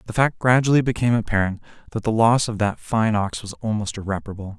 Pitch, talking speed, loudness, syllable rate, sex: 110 Hz, 195 wpm, -21 LUFS, 6.3 syllables/s, male